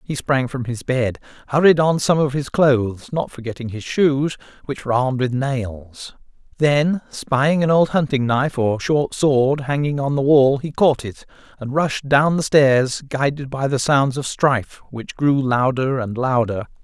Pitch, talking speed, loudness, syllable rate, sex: 135 Hz, 185 wpm, -19 LUFS, 4.3 syllables/s, male